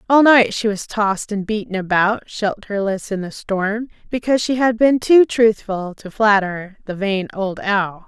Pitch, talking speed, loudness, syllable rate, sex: 210 Hz, 180 wpm, -18 LUFS, 4.4 syllables/s, female